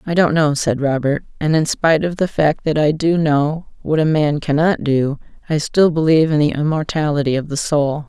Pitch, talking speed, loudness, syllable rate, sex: 150 Hz, 215 wpm, -17 LUFS, 5.2 syllables/s, female